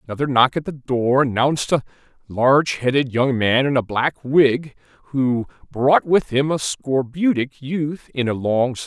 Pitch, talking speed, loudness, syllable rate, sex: 135 Hz, 175 wpm, -19 LUFS, 4.4 syllables/s, male